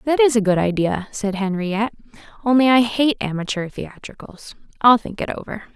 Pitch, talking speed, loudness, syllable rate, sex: 220 Hz, 165 wpm, -19 LUFS, 5.2 syllables/s, female